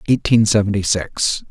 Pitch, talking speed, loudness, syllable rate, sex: 105 Hz, 120 wpm, -17 LUFS, 2.3 syllables/s, male